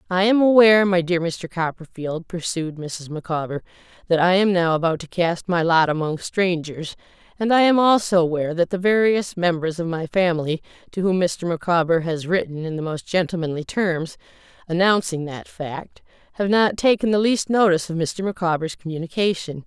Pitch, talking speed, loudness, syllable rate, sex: 175 Hz, 175 wpm, -21 LUFS, 5.2 syllables/s, female